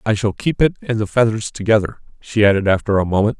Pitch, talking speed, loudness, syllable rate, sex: 110 Hz, 230 wpm, -17 LUFS, 6.3 syllables/s, male